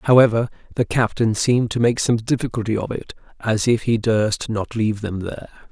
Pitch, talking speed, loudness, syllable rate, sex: 115 Hz, 190 wpm, -20 LUFS, 5.5 syllables/s, male